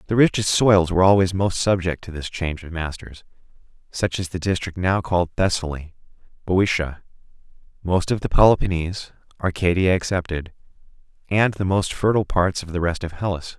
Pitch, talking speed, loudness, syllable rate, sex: 90 Hz, 160 wpm, -21 LUFS, 5.6 syllables/s, male